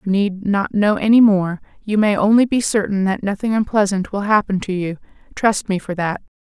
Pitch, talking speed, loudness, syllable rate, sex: 200 Hz, 205 wpm, -18 LUFS, 5.2 syllables/s, female